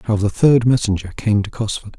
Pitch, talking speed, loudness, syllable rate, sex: 110 Hz, 210 wpm, -17 LUFS, 5.2 syllables/s, male